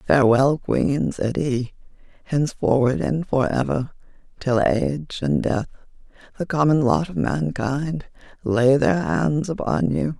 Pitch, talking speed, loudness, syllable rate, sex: 140 Hz, 130 wpm, -21 LUFS, 4.0 syllables/s, female